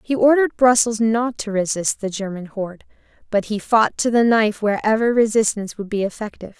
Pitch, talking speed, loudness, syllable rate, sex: 220 Hz, 180 wpm, -19 LUFS, 5.8 syllables/s, female